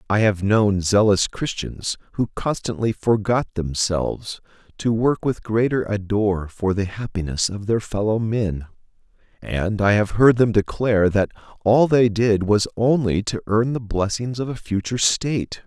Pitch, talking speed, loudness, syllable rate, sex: 105 Hz, 155 wpm, -21 LUFS, 4.5 syllables/s, male